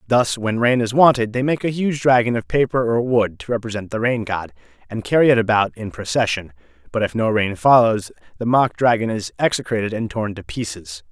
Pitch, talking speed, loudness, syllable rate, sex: 110 Hz, 210 wpm, -19 LUFS, 5.5 syllables/s, male